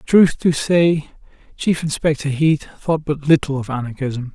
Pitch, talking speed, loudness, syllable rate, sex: 150 Hz, 150 wpm, -18 LUFS, 4.4 syllables/s, male